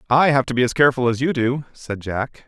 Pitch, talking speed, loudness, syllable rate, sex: 130 Hz, 265 wpm, -19 LUFS, 5.9 syllables/s, male